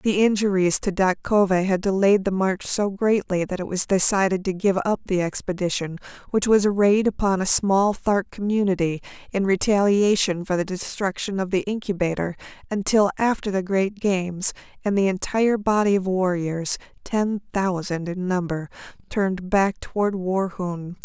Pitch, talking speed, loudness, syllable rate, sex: 190 Hz, 160 wpm, -22 LUFS, 4.8 syllables/s, female